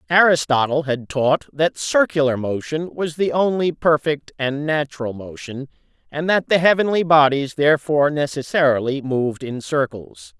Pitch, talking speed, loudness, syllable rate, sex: 145 Hz, 135 wpm, -19 LUFS, 4.8 syllables/s, male